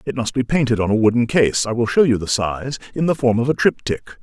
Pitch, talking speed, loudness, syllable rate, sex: 120 Hz, 255 wpm, -18 LUFS, 5.8 syllables/s, male